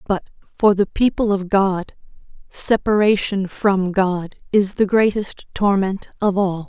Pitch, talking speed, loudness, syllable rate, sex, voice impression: 195 Hz, 135 wpm, -19 LUFS, 4.0 syllables/s, female, feminine, adult-like, tensed, slightly weak, slightly dark, clear, intellectual, calm, reassuring, elegant, kind, modest